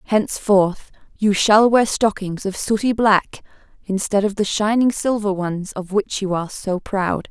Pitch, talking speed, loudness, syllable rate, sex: 200 Hz, 165 wpm, -19 LUFS, 4.3 syllables/s, female